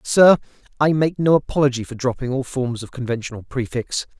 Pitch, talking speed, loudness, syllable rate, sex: 130 Hz, 170 wpm, -20 LUFS, 5.6 syllables/s, male